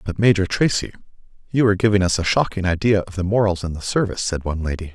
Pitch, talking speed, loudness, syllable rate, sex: 95 Hz, 230 wpm, -20 LUFS, 7.0 syllables/s, male